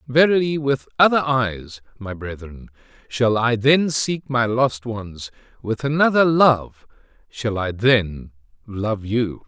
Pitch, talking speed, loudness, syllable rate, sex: 120 Hz, 135 wpm, -19 LUFS, 3.6 syllables/s, male